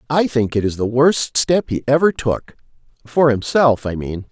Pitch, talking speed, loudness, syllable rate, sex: 130 Hz, 180 wpm, -17 LUFS, 4.5 syllables/s, male